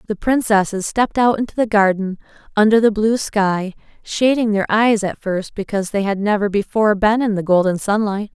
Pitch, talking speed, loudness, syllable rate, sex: 210 Hz, 185 wpm, -17 LUFS, 5.4 syllables/s, female